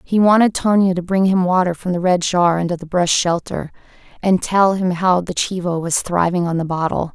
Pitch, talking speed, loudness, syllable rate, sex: 180 Hz, 220 wpm, -17 LUFS, 5.2 syllables/s, female